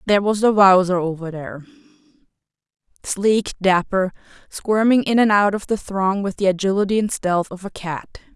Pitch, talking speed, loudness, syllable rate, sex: 195 Hz, 160 wpm, -19 LUFS, 5.1 syllables/s, female